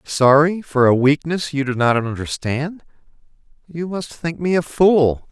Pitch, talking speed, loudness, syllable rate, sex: 150 Hz, 160 wpm, -18 LUFS, 4.1 syllables/s, male